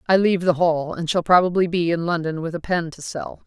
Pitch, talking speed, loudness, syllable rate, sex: 170 Hz, 260 wpm, -21 LUFS, 5.8 syllables/s, female